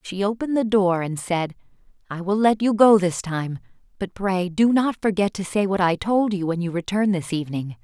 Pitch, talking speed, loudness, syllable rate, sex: 190 Hz, 220 wpm, -21 LUFS, 5.2 syllables/s, female